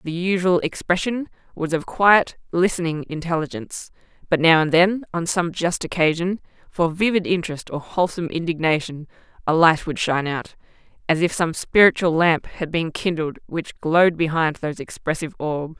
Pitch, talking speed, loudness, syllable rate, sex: 170 Hz, 155 wpm, -21 LUFS, 5.3 syllables/s, female